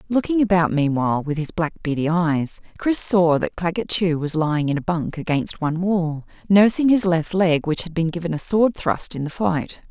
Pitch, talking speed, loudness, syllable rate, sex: 170 Hz, 210 wpm, -20 LUFS, 5.0 syllables/s, female